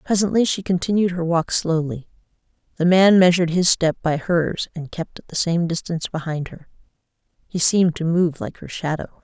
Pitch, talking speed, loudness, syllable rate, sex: 170 Hz, 180 wpm, -20 LUFS, 5.2 syllables/s, female